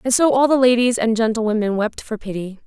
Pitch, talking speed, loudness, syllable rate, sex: 230 Hz, 225 wpm, -18 LUFS, 5.9 syllables/s, female